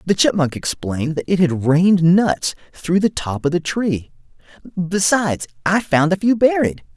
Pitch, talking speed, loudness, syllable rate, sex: 170 Hz, 165 wpm, -18 LUFS, 4.7 syllables/s, male